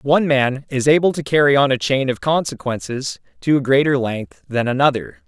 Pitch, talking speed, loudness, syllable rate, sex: 135 Hz, 195 wpm, -18 LUFS, 5.3 syllables/s, male